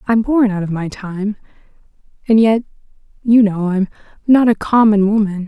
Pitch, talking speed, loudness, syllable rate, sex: 210 Hz, 165 wpm, -15 LUFS, 4.9 syllables/s, female